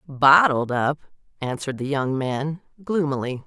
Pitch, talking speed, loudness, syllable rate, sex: 140 Hz, 120 wpm, -22 LUFS, 4.6 syllables/s, female